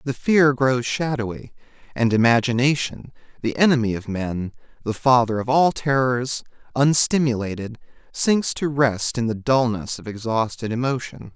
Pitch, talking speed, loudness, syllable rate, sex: 125 Hz, 130 wpm, -21 LUFS, 4.6 syllables/s, male